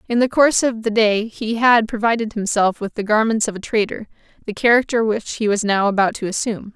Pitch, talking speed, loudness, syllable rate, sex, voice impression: 220 Hz, 220 wpm, -18 LUFS, 5.8 syllables/s, female, feminine, slightly gender-neutral, slightly young, slightly adult-like, thin, tensed, slightly powerful, very bright, slightly hard, very clear, fluent, cute, slightly cool, intellectual, very refreshing, slightly sincere, friendly, reassuring, slightly unique, very wild, lively, kind